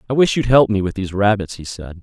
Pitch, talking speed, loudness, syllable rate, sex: 105 Hz, 295 wpm, -17 LUFS, 6.6 syllables/s, male